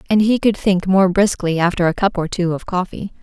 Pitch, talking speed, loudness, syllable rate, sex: 185 Hz, 240 wpm, -17 LUFS, 5.4 syllables/s, female